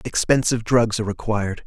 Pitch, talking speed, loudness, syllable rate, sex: 110 Hz, 145 wpm, -20 LUFS, 6.4 syllables/s, male